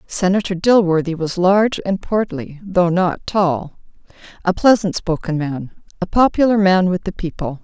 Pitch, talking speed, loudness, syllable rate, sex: 185 Hz, 140 wpm, -17 LUFS, 4.6 syllables/s, female